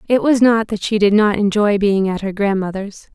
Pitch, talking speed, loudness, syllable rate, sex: 205 Hz, 230 wpm, -16 LUFS, 5.1 syllables/s, female